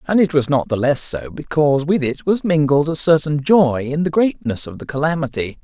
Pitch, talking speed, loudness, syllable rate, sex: 150 Hz, 225 wpm, -18 LUFS, 5.3 syllables/s, male